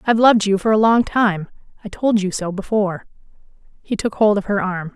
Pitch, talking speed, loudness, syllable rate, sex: 205 Hz, 205 wpm, -18 LUFS, 5.9 syllables/s, female